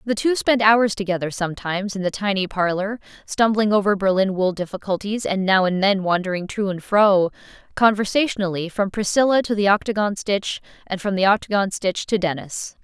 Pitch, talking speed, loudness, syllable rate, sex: 200 Hz, 175 wpm, -20 LUFS, 5.4 syllables/s, female